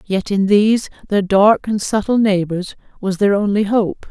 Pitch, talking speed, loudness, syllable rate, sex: 205 Hz, 175 wpm, -16 LUFS, 4.5 syllables/s, female